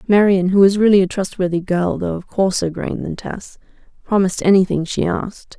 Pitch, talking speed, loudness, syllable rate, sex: 190 Hz, 185 wpm, -17 LUFS, 5.4 syllables/s, female